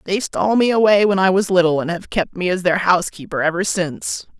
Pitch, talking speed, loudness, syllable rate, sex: 175 Hz, 230 wpm, -17 LUFS, 6.0 syllables/s, male